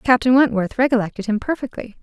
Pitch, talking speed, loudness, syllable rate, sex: 235 Hz, 150 wpm, -18 LUFS, 6.3 syllables/s, female